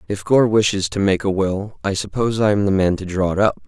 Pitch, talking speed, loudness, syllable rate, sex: 100 Hz, 275 wpm, -18 LUFS, 5.9 syllables/s, male